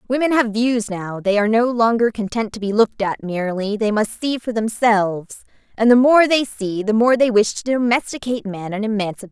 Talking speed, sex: 220 wpm, female